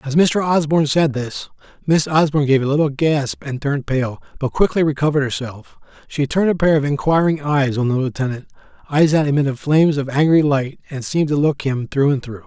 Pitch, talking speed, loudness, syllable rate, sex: 145 Hz, 200 wpm, -18 LUFS, 5.9 syllables/s, male